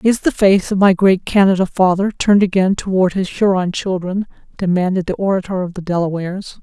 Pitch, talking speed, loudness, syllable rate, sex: 190 Hz, 180 wpm, -16 LUFS, 5.6 syllables/s, female